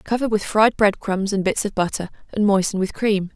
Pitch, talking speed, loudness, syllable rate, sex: 200 Hz, 235 wpm, -20 LUFS, 5.2 syllables/s, female